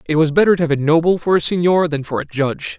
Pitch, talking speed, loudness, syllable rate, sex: 160 Hz, 300 wpm, -16 LUFS, 6.7 syllables/s, male